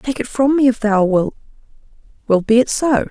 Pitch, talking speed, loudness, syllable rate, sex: 240 Hz, 195 wpm, -16 LUFS, 5.1 syllables/s, female